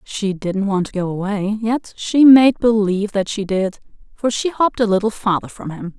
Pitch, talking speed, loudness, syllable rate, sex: 210 Hz, 210 wpm, -17 LUFS, 4.9 syllables/s, female